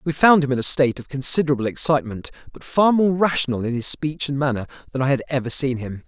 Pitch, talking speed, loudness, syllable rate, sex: 140 Hz, 235 wpm, -20 LUFS, 6.6 syllables/s, male